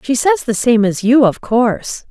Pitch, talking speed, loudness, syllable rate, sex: 240 Hz, 230 wpm, -14 LUFS, 4.6 syllables/s, female